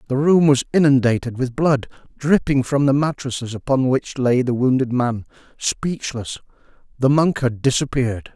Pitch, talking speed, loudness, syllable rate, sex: 130 Hz, 150 wpm, -19 LUFS, 4.8 syllables/s, male